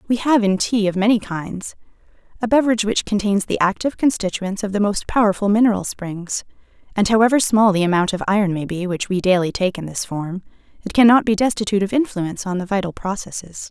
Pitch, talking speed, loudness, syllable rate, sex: 200 Hz, 200 wpm, -19 LUFS, 6.1 syllables/s, female